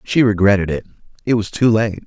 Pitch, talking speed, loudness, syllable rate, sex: 105 Hz, 205 wpm, -16 LUFS, 5.8 syllables/s, male